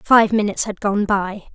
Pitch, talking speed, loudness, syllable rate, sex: 205 Hz, 195 wpm, -18 LUFS, 5.0 syllables/s, female